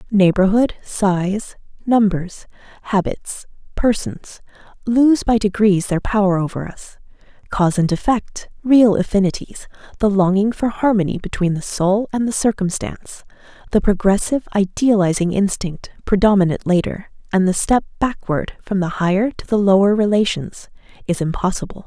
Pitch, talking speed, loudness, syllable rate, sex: 200 Hz, 125 wpm, -18 LUFS, 4.9 syllables/s, female